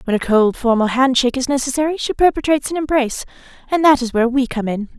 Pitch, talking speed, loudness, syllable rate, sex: 260 Hz, 215 wpm, -17 LUFS, 6.9 syllables/s, female